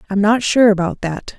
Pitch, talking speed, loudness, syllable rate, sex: 205 Hz, 215 wpm, -15 LUFS, 5.0 syllables/s, female